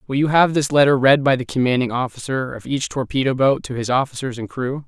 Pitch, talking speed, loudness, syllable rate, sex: 130 Hz, 235 wpm, -19 LUFS, 5.9 syllables/s, male